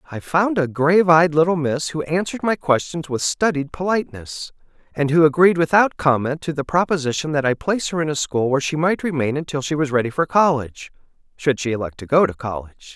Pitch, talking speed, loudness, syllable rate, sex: 155 Hz, 210 wpm, -19 LUFS, 6.0 syllables/s, male